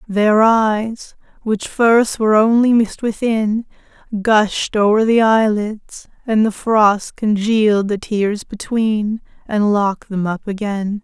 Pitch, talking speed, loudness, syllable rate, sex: 215 Hz, 130 wpm, -16 LUFS, 3.5 syllables/s, female